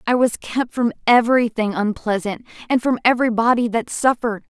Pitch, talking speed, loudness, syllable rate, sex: 230 Hz, 145 wpm, -19 LUFS, 5.6 syllables/s, female